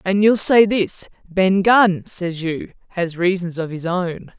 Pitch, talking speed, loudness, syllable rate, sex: 180 Hz, 180 wpm, -18 LUFS, 3.7 syllables/s, female